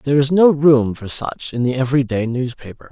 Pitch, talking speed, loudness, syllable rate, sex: 130 Hz, 205 wpm, -17 LUFS, 5.6 syllables/s, male